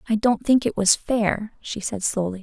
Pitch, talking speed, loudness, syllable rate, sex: 215 Hz, 220 wpm, -22 LUFS, 4.6 syllables/s, female